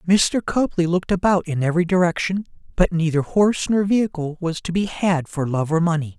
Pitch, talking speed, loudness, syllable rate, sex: 175 Hz, 195 wpm, -20 LUFS, 5.7 syllables/s, male